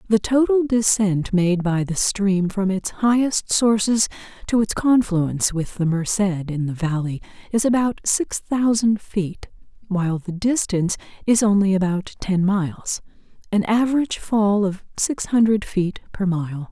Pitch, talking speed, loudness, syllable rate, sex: 200 Hz, 150 wpm, -20 LUFS, 4.3 syllables/s, female